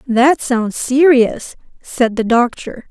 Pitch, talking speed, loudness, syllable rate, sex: 250 Hz, 125 wpm, -14 LUFS, 3.2 syllables/s, female